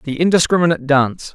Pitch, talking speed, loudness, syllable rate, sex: 155 Hz, 135 wpm, -15 LUFS, 7.3 syllables/s, male